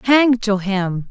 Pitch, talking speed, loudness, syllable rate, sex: 215 Hz, 165 wpm, -17 LUFS, 3.2 syllables/s, female